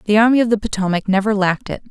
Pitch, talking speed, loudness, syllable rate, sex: 210 Hz, 250 wpm, -17 LUFS, 7.7 syllables/s, female